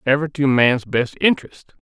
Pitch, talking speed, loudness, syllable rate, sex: 135 Hz, 165 wpm, -18 LUFS, 4.8 syllables/s, male